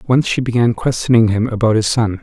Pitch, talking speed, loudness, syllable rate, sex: 115 Hz, 215 wpm, -15 LUFS, 5.7 syllables/s, male